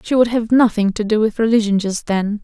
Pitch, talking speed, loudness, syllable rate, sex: 215 Hz, 245 wpm, -16 LUFS, 5.6 syllables/s, female